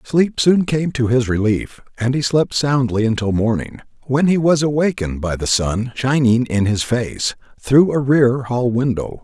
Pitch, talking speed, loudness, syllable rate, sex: 125 Hz, 180 wpm, -17 LUFS, 4.4 syllables/s, male